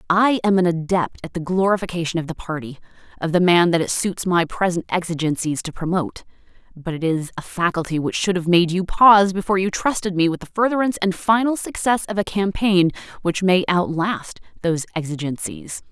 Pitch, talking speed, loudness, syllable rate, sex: 180 Hz, 190 wpm, -20 LUFS, 5.7 syllables/s, female